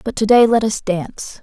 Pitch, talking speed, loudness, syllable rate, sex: 215 Hz, 250 wpm, -15 LUFS, 5.3 syllables/s, female